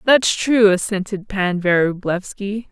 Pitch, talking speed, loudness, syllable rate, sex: 200 Hz, 110 wpm, -18 LUFS, 3.5 syllables/s, female